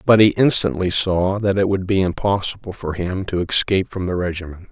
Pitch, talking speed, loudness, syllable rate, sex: 95 Hz, 205 wpm, -19 LUFS, 5.5 syllables/s, male